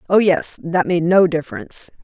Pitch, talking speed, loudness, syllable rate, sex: 180 Hz, 175 wpm, -17 LUFS, 5.2 syllables/s, female